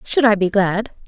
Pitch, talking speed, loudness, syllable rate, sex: 210 Hz, 220 wpm, -17 LUFS, 4.6 syllables/s, female